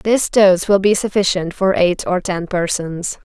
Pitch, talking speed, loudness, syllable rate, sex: 190 Hz, 180 wpm, -16 LUFS, 4.1 syllables/s, female